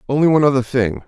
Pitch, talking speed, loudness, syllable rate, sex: 135 Hz, 225 wpm, -16 LUFS, 7.7 syllables/s, male